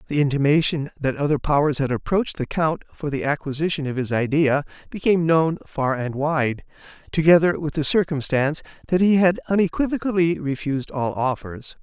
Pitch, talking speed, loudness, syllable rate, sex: 150 Hz, 155 wpm, -21 LUFS, 5.5 syllables/s, male